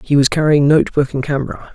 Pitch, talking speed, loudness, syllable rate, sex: 140 Hz, 240 wpm, -15 LUFS, 6.1 syllables/s, male